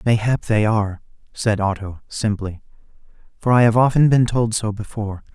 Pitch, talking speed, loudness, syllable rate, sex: 110 Hz, 155 wpm, -19 LUFS, 5.2 syllables/s, male